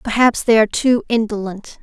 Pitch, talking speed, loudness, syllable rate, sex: 220 Hz, 165 wpm, -16 LUFS, 5.4 syllables/s, female